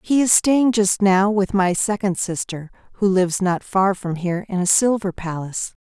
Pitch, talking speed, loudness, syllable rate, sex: 195 Hz, 195 wpm, -19 LUFS, 4.9 syllables/s, female